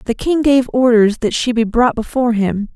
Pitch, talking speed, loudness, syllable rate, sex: 235 Hz, 220 wpm, -15 LUFS, 5.1 syllables/s, female